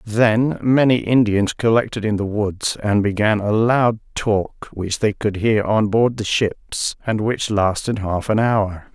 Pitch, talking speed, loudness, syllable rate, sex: 105 Hz, 175 wpm, -19 LUFS, 3.8 syllables/s, male